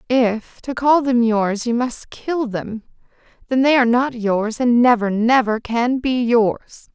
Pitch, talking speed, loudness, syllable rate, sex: 240 Hz, 175 wpm, -18 LUFS, 3.8 syllables/s, female